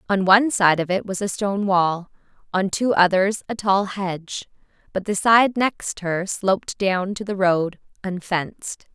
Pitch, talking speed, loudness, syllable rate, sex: 195 Hz, 175 wpm, -21 LUFS, 4.4 syllables/s, female